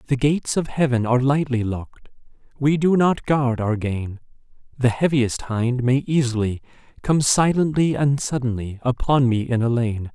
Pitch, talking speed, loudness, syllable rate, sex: 130 Hz, 160 wpm, -21 LUFS, 4.7 syllables/s, male